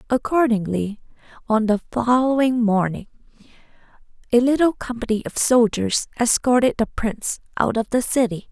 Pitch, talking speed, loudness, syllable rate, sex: 235 Hz, 120 wpm, -20 LUFS, 5.0 syllables/s, female